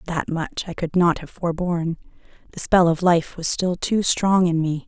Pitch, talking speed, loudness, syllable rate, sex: 170 Hz, 210 wpm, -21 LUFS, 4.7 syllables/s, female